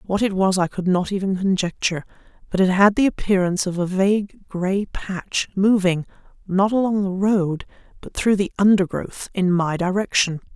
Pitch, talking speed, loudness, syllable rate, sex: 190 Hz, 160 wpm, -20 LUFS, 4.9 syllables/s, female